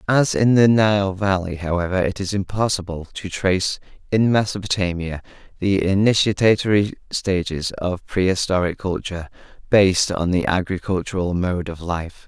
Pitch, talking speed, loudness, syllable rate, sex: 95 Hz, 125 wpm, -20 LUFS, 5.1 syllables/s, male